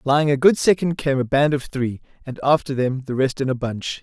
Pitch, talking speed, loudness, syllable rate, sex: 140 Hz, 255 wpm, -20 LUFS, 5.5 syllables/s, male